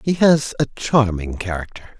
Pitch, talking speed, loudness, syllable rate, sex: 115 Hz, 150 wpm, -19 LUFS, 4.5 syllables/s, male